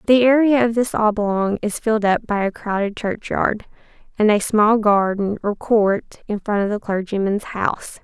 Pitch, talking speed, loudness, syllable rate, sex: 210 Hz, 180 wpm, -19 LUFS, 4.6 syllables/s, female